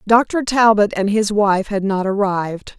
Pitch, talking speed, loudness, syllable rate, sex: 205 Hz, 175 wpm, -17 LUFS, 4.2 syllables/s, female